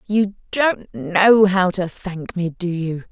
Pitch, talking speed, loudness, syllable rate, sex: 185 Hz, 155 wpm, -19 LUFS, 3.2 syllables/s, female